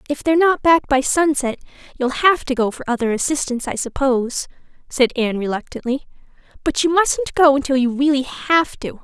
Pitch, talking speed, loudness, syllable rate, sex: 275 Hz, 180 wpm, -18 LUFS, 5.6 syllables/s, female